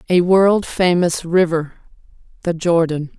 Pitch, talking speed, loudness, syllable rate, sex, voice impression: 175 Hz, 95 wpm, -17 LUFS, 3.9 syllables/s, female, feminine, very adult-like, slightly intellectual, calm